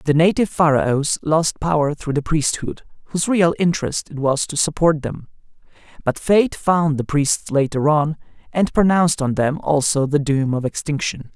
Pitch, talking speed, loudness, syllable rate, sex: 150 Hz, 170 wpm, -19 LUFS, 4.7 syllables/s, male